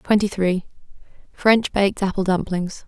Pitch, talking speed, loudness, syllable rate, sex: 195 Hz, 105 wpm, -20 LUFS, 4.8 syllables/s, female